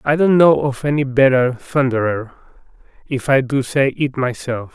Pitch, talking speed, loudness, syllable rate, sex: 135 Hz, 165 wpm, -17 LUFS, 4.6 syllables/s, male